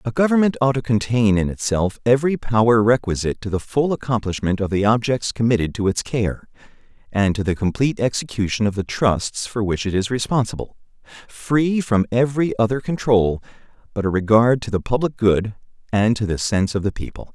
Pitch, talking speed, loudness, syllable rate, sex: 115 Hz, 185 wpm, -20 LUFS, 5.6 syllables/s, male